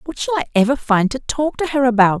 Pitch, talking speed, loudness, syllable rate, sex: 255 Hz, 275 wpm, -17 LUFS, 6.0 syllables/s, female